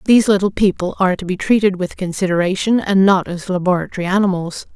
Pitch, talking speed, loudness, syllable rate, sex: 190 Hz, 175 wpm, -16 LUFS, 6.4 syllables/s, female